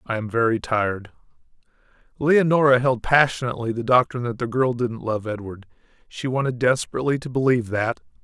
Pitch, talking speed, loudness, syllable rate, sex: 125 Hz, 155 wpm, -21 LUFS, 6.1 syllables/s, male